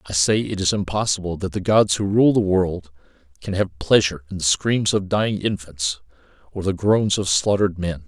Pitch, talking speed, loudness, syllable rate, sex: 95 Hz, 200 wpm, -20 LUFS, 5.3 syllables/s, male